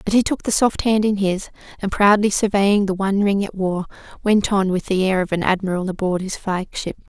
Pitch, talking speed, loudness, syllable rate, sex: 195 Hz, 225 wpm, -19 LUFS, 5.4 syllables/s, female